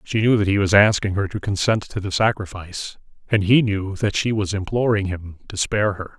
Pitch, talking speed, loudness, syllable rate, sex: 100 Hz, 225 wpm, -20 LUFS, 5.4 syllables/s, male